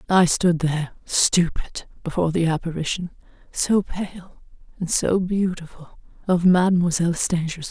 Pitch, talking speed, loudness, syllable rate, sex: 175 Hz, 100 wpm, -21 LUFS, 4.8 syllables/s, female